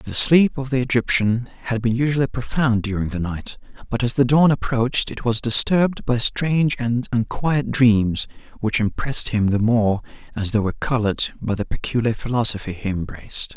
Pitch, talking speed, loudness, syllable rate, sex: 120 Hz, 175 wpm, -20 LUFS, 5.2 syllables/s, male